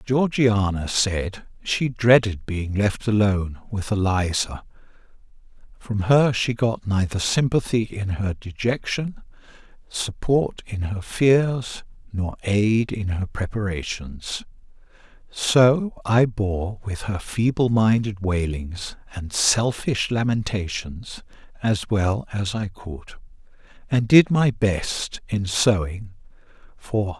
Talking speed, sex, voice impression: 120 wpm, male, very masculine, adult-like, middle-aged, very thick, tensed, powerful, slightly dark, slightly soft, slightly muffled, slightly fluent, slightly raspy, very cool, intellectual, sincere, calm, very mature, friendly, reassuring, very unique, slightly elegant, very wild, sweet, kind, slightly modest